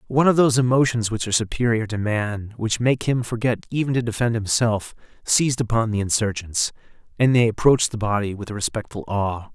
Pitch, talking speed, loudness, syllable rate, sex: 115 Hz, 180 wpm, -21 LUFS, 5.7 syllables/s, male